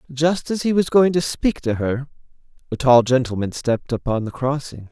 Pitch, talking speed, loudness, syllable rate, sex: 135 Hz, 195 wpm, -20 LUFS, 5.2 syllables/s, male